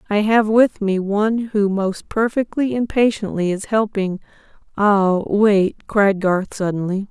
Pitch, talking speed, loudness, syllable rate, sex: 205 Hz, 135 wpm, -18 LUFS, 4.1 syllables/s, female